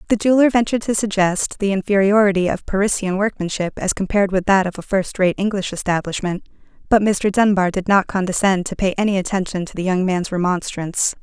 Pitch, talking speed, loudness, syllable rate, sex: 195 Hz, 185 wpm, -18 LUFS, 6.0 syllables/s, female